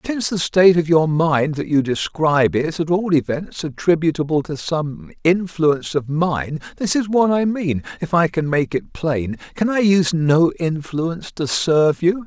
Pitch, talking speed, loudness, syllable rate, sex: 165 Hz, 175 wpm, -19 LUFS, 4.6 syllables/s, male